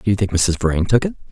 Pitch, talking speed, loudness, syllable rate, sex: 100 Hz, 320 wpm, -18 LUFS, 6.3 syllables/s, male